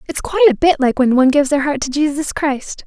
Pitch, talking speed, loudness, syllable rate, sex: 285 Hz, 275 wpm, -15 LUFS, 6.3 syllables/s, female